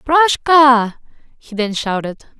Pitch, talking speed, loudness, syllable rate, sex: 255 Hz, 100 wpm, -14 LUFS, 3.5 syllables/s, female